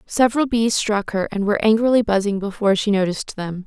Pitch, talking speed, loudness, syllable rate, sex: 210 Hz, 195 wpm, -19 LUFS, 6.3 syllables/s, female